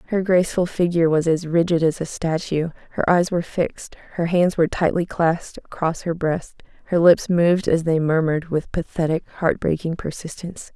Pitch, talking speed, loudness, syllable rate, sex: 170 Hz, 180 wpm, -21 LUFS, 5.5 syllables/s, female